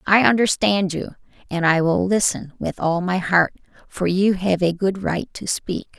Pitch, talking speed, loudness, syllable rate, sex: 185 Hz, 190 wpm, -20 LUFS, 4.3 syllables/s, female